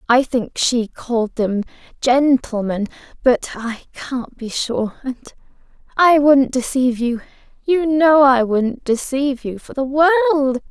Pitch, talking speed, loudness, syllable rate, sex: 260 Hz, 135 wpm, -17 LUFS, 4.0 syllables/s, female